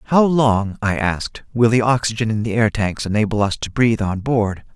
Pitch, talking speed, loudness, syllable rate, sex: 110 Hz, 215 wpm, -18 LUFS, 5.3 syllables/s, male